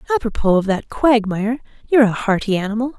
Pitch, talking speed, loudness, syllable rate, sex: 225 Hz, 160 wpm, -18 LUFS, 6.8 syllables/s, female